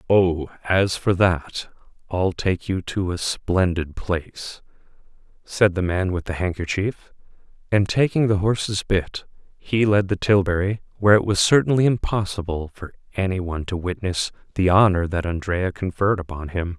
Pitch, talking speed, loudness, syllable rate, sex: 95 Hz, 155 wpm, -22 LUFS, 4.7 syllables/s, male